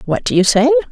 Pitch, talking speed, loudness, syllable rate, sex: 190 Hz, 265 wpm, -13 LUFS, 7.1 syllables/s, female